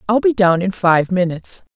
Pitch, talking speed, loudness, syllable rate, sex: 195 Hz, 205 wpm, -16 LUFS, 5.3 syllables/s, female